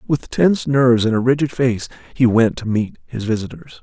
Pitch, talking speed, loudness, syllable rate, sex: 120 Hz, 205 wpm, -18 LUFS, 5.3 syllables/s, male